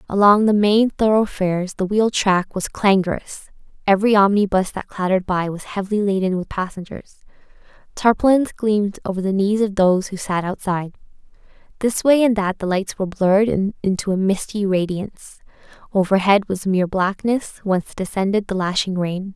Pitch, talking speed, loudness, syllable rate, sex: 195 Hz, 155 wpm, -19 LUFS, 5.5 syllables/s, female